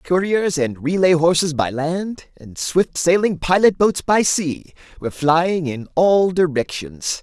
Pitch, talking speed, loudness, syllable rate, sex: 165 Hz, 150 wpm, -18 LUFS, 3.9 syllables/s, male